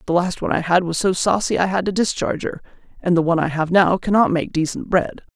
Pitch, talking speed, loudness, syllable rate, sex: 180 Hz, 260 wpm, -19 LUFS, 6.4 syllables/s, female